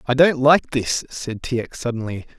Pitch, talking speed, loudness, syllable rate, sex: 130 Hz, 200 wpm, -20 LUFS, 4.8 syllables/s, male